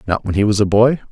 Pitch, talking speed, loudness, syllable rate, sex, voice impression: 105 Hz, 325 wpm, -15 LUFS, 6.9 syllables/s, male, very masculine, very adult-like, old, very thick, tensed, very powerful, slightly dark, slightly hard, muffled, fluent, slightly raspy, very cool, very intellectual, sincere, very calm, very mature, friendly, very reassuring, very unique, slightly elegant, very wild, sweet, slightly lively, very kind, slightly modest